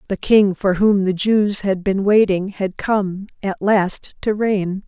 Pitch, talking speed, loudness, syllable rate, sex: 195 Hz, 185 wpm, -18 LUFS, 3.6 syllables/s, female